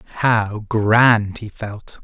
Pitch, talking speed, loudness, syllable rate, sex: 110 Hz, 120 wpm, -16 LUFS, 2.6 syllables/s, male